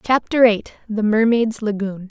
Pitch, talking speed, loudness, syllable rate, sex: 220 Hz, 140 wpm, -18 LUFS, 4.3 syllables/s, female